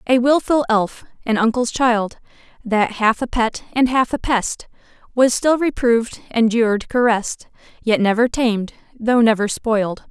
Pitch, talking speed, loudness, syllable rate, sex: 230 Hz, 145 wpm, -18 LUFS, 4.7 syllables/s, female